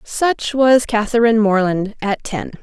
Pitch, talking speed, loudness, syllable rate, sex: 220 Hz, 135 wpm, -16 LUFS, 4.2 syllables/s, female